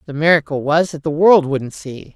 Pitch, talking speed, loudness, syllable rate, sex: 155 Hz, 225 wpm, -15 LUFS, 5.0 syllables/s, female